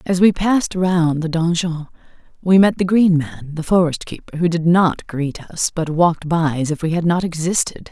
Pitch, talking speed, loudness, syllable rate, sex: 170 Hz, 210 wpm, -17 LUFS, 4.9 syllables/s, female